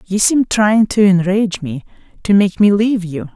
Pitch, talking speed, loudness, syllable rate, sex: 200 Hz, 195 wpm, -14 LUFS, 4.9 syllables/s, female